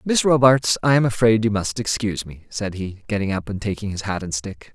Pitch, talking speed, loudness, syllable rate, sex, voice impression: 105 Hz, 240 wpm, -21 LUFS, 5.5 syllables/s, male, very masculine, very adult-like, slightly middle-aged, thick, very tensed, powerful, very bright, slightly soft, very clear, very fluent, very cool, intellectual, refreshing, sincere, very calm, slightly mature, very friendly, very reassuring, very unique, very elegant, slightly wild, very sweet, very lively, very kind, slightly intense, slightly modest